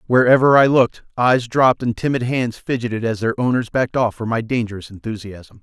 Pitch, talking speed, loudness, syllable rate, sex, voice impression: 120 Hz, 190 wpm, -18 LUFS, 5.8 syllables/s, male, masculine, adult-like, slightly refreshing, friendly